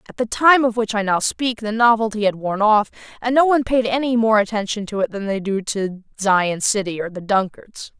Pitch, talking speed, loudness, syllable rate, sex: 215 Hz, 235 wpm, -19 LUFS, 5.3 syllables/s, female